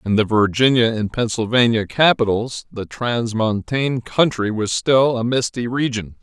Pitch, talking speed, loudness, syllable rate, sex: 115 Hz, 135 wpm, -18 LUFS, 4.5 syllables/s, male